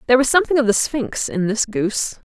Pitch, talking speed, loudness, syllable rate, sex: 235 Hz, 235 wpm, -18 LUFS, 6.3 syllables/s, female